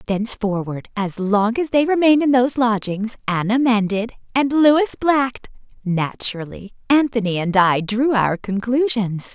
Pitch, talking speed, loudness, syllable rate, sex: 230 Hz, 135 wpm, -19 LUFS, 4.6 syllables/s, female